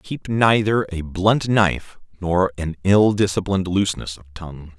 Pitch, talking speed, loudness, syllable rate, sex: 95 Hz, 150 wpm, -19 LUFS, 4.7 syllables/s, male